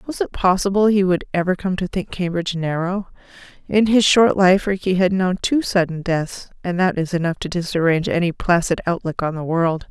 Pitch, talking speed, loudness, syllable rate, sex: 180 Hz, 200 wpm, -19 LUFS, 5.4 syllables/s, female